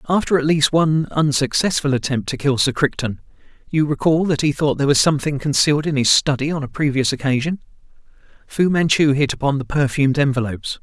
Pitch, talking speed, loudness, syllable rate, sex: 145 Hz, 170 wpm, -18 LUFS, 6.2 syllables/s, male